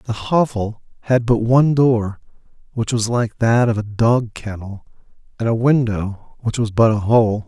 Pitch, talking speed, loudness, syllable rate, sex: 115 Hz, 175 wpm, -18 LUFS, 4.3 syllables/s, male